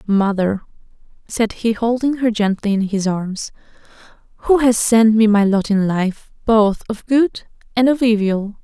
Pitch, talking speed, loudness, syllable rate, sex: 215 Hz, 160 wpm, -17 LUFS, 4.2 syllables/s, female